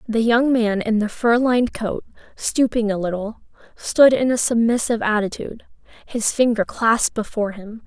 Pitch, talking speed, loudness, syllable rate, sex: 225 Hz, 160 wpm, -19 LUFS, 5.1 syllables/s, female